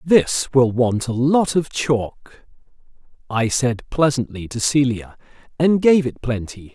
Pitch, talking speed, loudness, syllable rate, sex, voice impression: 130 Hz, 140 wpm, -19 LUFS, 3.8 syllables/s, male, very masculine, very adult-like, very middle-aged, thick, tensed, powerful, bright, slightly soft, slightly clear, fluent, slightly cool, intellectual, refreshing, slightly sincere, calm, mature, very friendly, reassuring, unique, slightly elegant, slightly wild, slightly sweet, lively, kind, slightly intense, slightly light